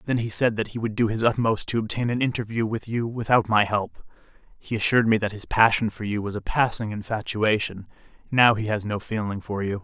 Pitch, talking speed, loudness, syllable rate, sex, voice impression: 110 Hz, 225 wpm, -24 LUFS, 5.7 syllables/s, male, masculine, middle-aged, slightly thick, tensed, slightly powerful, hard, slightly raspy, cool, calm, mature, wild, strict